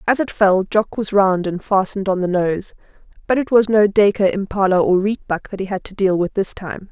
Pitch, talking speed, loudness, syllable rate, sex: 195 Hz, 235 wpm, -18 LUFS, 5.5 syllables/s, female